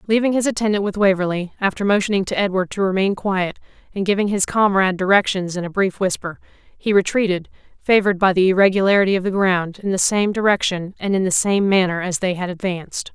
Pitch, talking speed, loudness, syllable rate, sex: 195 Hz, 195 wpm, -19 LUFS, 6.1 syllables/s, female